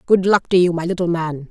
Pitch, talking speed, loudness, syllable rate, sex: 175 Hz, 280 wpm, -17 LUFS, 5.8 syllables/s, female